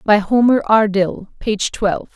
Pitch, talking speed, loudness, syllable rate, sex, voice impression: 210 Hz, 165 wpm, -16 LUFS, 4.6 syllables/s, female, feminine, very adult-like, slightly clear, slightly intellectual, elegant, slightly strict